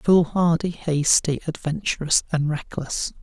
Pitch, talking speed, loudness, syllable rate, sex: 160 Hz, 95 wpm, -22 LUFS, 4.0 syllables/s, male